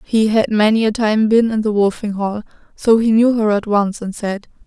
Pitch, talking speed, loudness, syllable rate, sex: 215 Hz, 230 wpm, -16 LUFS, 4.9 syllables/s, female